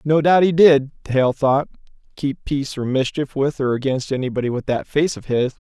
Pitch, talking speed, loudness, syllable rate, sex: 140 Hz, 200 wpm, -19 LUFS, 5.2 syllables/s, male